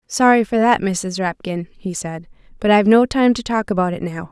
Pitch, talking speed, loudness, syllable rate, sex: 200 Hz, 220 wpm, -17 LUFS, 5.3 syllables/s, female